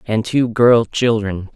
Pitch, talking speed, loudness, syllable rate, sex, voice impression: 115 Hz, 155 wpm, -16 LUFS, 3.5 syllables/s, male, very masculine, very adult-like, thick, slightly tensed, slightly weak, slightly dark, soft, clear, fluent, slightly cool, intellectual, refreshing, slightly sincere, calm, slightly mature, slightly friendly, slightly reassuring, unique, elegant, slightly wild, slightly sweet, lively, slightly kind, slightly intense, modest